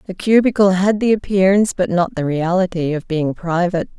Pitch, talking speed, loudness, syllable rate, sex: 185 Hz, 180 wpm, -17 LUFS, 5.6 syllables/s, female